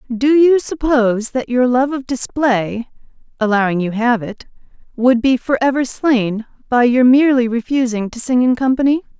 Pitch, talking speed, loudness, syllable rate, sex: 250 Hz, 155 wpm, -15 LUFS, 4.8 syllables/s, female